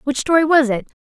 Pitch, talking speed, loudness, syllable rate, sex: 280 Hz, 230 wpm, -16 LUFS, 5.9 syllables/s, female